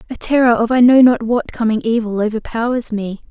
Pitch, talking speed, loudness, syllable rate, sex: 230 Hz, 200 wpm, -15 LUFS, 5.6 syllables/s, female